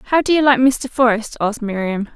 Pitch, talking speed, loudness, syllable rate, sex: 240 Hz, 225 wpm, -17 LUFS, 6.0 syllables/s, female